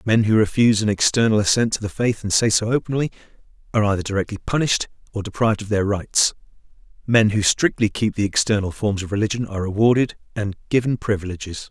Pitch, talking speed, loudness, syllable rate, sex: 105 Hz, 185 wpm, -20 LUFS, 6.5 syllables/s, male